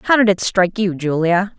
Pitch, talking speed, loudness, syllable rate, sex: 190 Hz, 230 wpm, -16 LUFS, 5.8 syllables/s, female